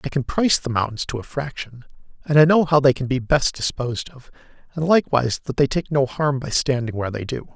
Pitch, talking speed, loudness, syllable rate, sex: 135 Hz, 240 wpm, -20 LUFS, 6.0 syllables/s, male